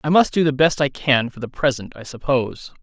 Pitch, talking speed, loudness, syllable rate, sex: 135 Hz, 255 wpm, -19 LUFS, 5.6 syllables/s, male